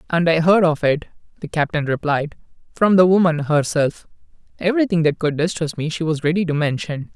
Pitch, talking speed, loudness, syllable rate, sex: 160 Hz, 185 wpm, -19 LUFS, 5.6 syllables/s, male